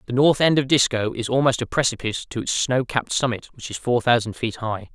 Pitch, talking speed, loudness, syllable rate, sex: 120 Hz, 245 wpm, -21 LUFS, 5.9 syllables/s, male